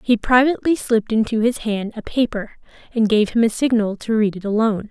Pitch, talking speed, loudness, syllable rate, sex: 225 Hz, 210 wpm, -19 LUFS, 5.9 syllables/s, female